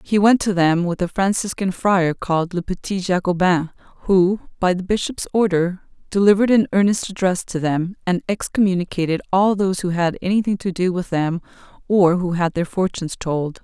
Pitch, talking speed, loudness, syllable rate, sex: 185 Hz, 175 wpm, -19 LUFS, 5.3 syllables/s, female